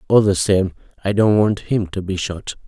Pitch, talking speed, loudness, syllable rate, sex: 100 Hz, 225 wpm, -19 LUFS, 4.7 syllables/s, male